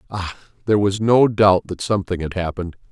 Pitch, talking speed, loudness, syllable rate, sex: 95 Hz, 185 wpm, -19 LUFS, 6.1 syllables/s, male